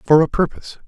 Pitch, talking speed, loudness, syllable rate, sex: 145 Hz, 205 wpm, -17 LUFS, 7.5 syllables/s, male